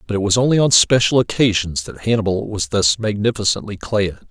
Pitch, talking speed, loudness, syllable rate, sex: 105 Hz, 180 wpm, -17 LUFS, 5.5 syllables/s, male